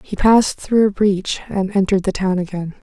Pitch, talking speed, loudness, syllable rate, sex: 195 Hz, 205 wpm, -17 LUFS, 5.4 syllables/s, female